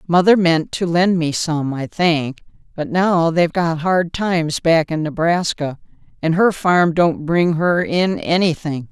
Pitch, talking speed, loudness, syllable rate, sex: 165 Hz, 170 wpm, -17 LUFS, 4.0 syllables/s, female